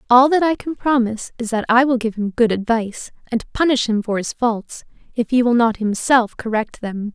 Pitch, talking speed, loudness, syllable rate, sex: 235 Hz, 220 wpm, -18 LUFS, 5.2 syllables/s, female